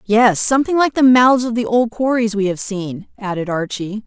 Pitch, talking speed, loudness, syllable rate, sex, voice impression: 225 Hz, 205 wpm, -16 LUFS, 4.9 syllables/s, female, very feminine, slightly young, adult-like, very thin, very tensed, slightly powerful, bright, slightly hard, very clear, very fluent, slightly cute, cool, very intellectual, refreshing, sincere, calm, friendly, slightly reassuring, unique, elegant, slightly sweet, slightly strict, slightly intense, slightly sharp